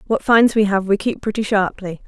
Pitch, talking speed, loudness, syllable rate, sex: 205 Hz, 230 wpm, -17 LUFS, 5.9 syllables/s, female